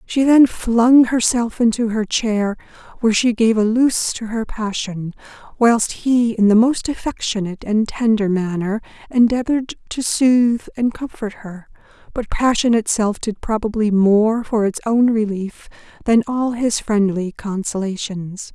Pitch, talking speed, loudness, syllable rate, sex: 220 Hz, 145 wpm, -18 LUFS, 4.3 syllables/s, female